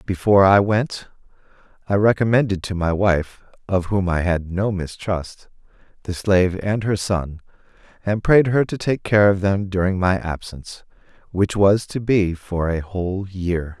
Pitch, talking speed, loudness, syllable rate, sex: 95 Hz, 165 wpm, -20 LUFS, 4.5 syllables/s, male